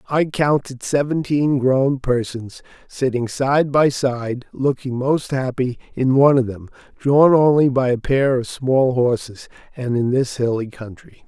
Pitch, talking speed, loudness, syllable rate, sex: 130 Hz, 155 wpm, -18 LUFS, 4.1 syllables/s, male